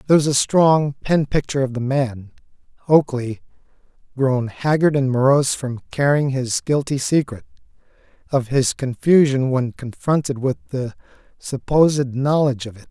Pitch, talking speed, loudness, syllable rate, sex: 135 Hz, 140 wpm, -19 LUFS, 4.8 syllables/s, male